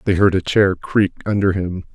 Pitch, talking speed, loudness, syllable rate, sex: 95 Hz, 215 wpm, -18 LUFS, 5.0 syllables/s, male